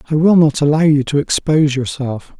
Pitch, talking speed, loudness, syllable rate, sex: 145 Hz, 200 wpm, -14 LUFS, 5.6 syllables/s, male